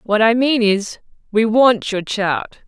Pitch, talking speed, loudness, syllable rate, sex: 215 Hz, 180 wpm, -16 LUFS, 3.9 syllables/s, female